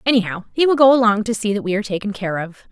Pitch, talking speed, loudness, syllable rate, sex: 215 Hz, 285 wpm, -18 LUFS, 7.3 syllables/s, female